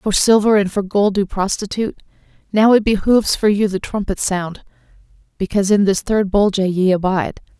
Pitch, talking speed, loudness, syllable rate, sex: 200 Hz, 175 wpm, -17 LUFS, 5.6 syllables/s, female